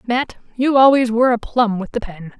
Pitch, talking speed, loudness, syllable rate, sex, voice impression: 235 Hz, 225 wpm, -16 LUFS, 5.2 syllables/s, female, feminine, adult-like, fluent, slightly sincere, calm, friendly